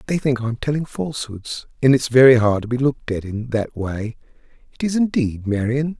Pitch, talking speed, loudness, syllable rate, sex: 125 Hz, 200 wpm, -19 LUFS, 5.3 syllables/s, male